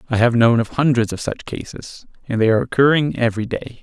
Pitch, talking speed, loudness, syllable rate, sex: 120 Hz, 220 wpm, -18 LUFS, 6.1 syllables/s, male